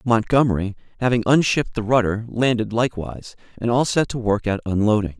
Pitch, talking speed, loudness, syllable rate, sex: 115 Hz, 160 wpm, -20 LUFS, 6.0 syllables/s, male